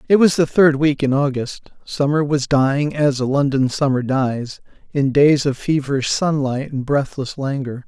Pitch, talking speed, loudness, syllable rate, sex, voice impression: 140 Hz, 175 wpm, -18 LUFS, 4.6 syllables/s, male, masculine, adult-like, refreshing, slightly sincere, friendly, slightly kind